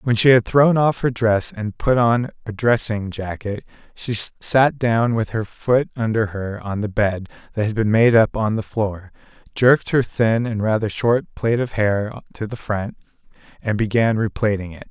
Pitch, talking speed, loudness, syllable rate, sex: 110 Hz, 195 wpm, -19 LUFS, 4.4 syllables/s, male